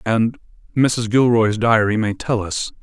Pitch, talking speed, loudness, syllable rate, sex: 110 Hz, 150 wpm, -18 LUFS, 4.0 syllables/s, male